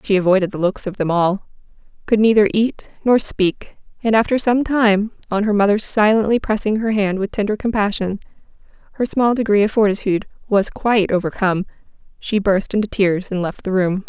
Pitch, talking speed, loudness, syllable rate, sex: 205 Hz, 180 wpm, -18 LUFS, 5.5 syllables/s, female